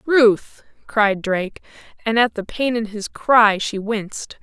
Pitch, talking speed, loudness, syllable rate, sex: 220 Hz, 165 wpm, -19 LUFS, 3.9 syllables/s, female